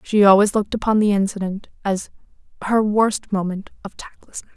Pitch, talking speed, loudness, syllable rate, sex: 205 Hz, 160 wpm, -19 LUFS, 5.5 syllables/s, female